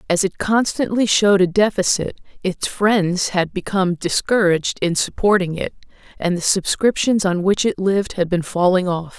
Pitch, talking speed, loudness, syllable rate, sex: 190 Hz, 165 wpm, -18 LUFS, 4.9 syllables/s, female